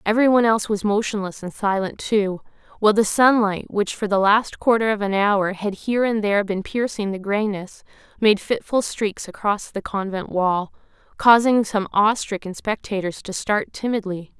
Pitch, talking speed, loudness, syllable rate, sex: 205 Hz, 175 wpm, -21 LUFS, 5.0 syllables/s, female